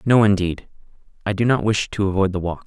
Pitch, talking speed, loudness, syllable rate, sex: 100 Hz, 225 wpm, -20 LUFS, 6.0 syllables/s, male